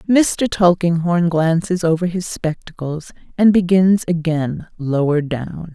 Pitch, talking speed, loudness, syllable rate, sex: 170 Hz, 115 wpm, -17 LUFS, 3.9 syllables/s, female